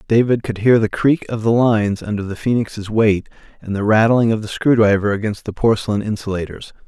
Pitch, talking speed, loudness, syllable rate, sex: 110 Hz, 200 wpm, -17 LUFS, 5.6 syllables/s, male